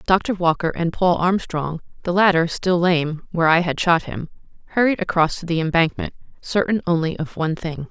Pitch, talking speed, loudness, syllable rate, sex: 170 Hz, 165 wpm, -20 LUFS, 5.4 syllables/s, female